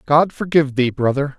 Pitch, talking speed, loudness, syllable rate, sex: 145 Hz, 175 wpm, -18 LUFS, 5.5 syllables/s, male